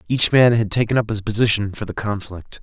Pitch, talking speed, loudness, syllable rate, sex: 110 Hz, 230 wpm, -18 LUFS, 5.7 syllables/s, male